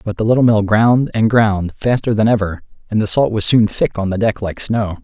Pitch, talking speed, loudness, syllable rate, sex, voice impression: 110 Hz, 250 wpm, -15 LUFS, 5.2 syllables/s, male, masculine, adult-like, slightly clear, slightly fluent, refreshing, sincere, slightly kind